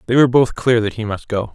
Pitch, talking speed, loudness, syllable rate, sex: 115 Hz, 310 wpm, -17 LUFS, 6.6 syllables/s, male